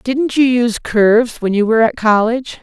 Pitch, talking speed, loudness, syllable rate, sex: 235 Hz, 205 wpm, -14 LUFS, 5.6 syllables/s, female